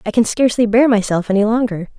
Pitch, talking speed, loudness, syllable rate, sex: 220 Hz, 210 wpm, -15 LUFS, 6.6 syllables/s, female